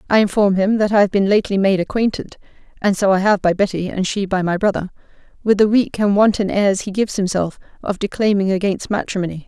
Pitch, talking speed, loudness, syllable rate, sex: 195 Hz, 215 wpm, -17 LUFS, 4.9 syllables/s, female